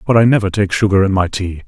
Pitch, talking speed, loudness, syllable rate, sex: 100 Hz, 285 wpm, -14 LUFS, 6.6 syllables/s, male